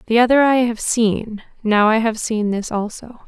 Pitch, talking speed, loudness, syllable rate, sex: 225 Hz, 200 wpm, -17 LUFS, 4.6 syllables/s, female